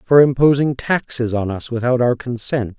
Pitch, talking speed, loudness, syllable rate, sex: 125 Hz, 170 wpm, -18 LUFS, 4.9 syllables/s, male